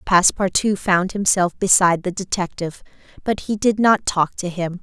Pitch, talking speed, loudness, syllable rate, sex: 190 Hz, 160 wpm, -19 LUFS, 5.1 syllables/s, female